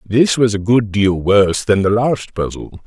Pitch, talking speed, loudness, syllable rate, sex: 105 Hz, 210 wpm, -15 LUFS, 4.3 syllables/s, male